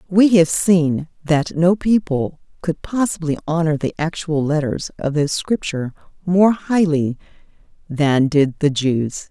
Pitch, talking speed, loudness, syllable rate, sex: 160 Hz, 135 wpm, -18 LUFS, 4.0 syllables/s, female